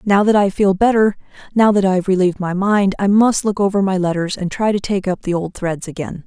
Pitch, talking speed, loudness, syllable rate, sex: 195 Hz, 260 wpm, -16 LUFS, 5.7 syllables/s, female